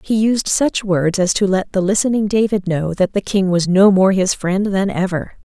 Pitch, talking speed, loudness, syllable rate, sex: 195 Hz, 230 wpm, -16 LUFS, 4.7 syllables/s, female